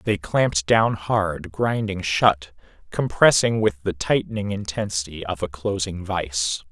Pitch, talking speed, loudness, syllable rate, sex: 95 Hz, 135 wpm, -22 LUFS, 4.0 syllables/s, male